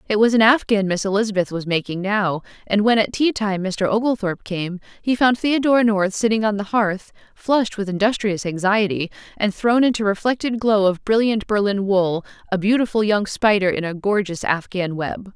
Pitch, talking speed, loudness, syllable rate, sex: 205 Hz, 185 wpm, -19 LUFS, 5.2 syllables/s, female